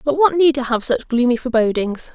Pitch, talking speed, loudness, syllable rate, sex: 265 Hz, 225 wpm, -17 LUFS, 5.9 syllables/s, female